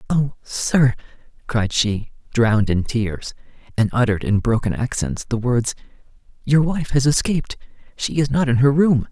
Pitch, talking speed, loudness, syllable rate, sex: 125 Hz, 150 wpm, -20 LUFS, 4.7 syllables/s, male